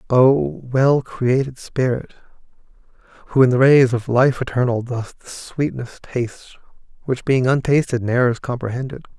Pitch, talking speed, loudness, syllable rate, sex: 125 Hz, 135 wpm, -18 LUFS, 4.8 syllables/s, male